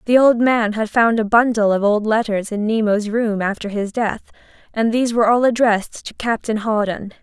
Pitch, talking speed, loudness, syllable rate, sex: 220 Hz, 200 wpm, -18 LUFS, 5.2 syllables/s, female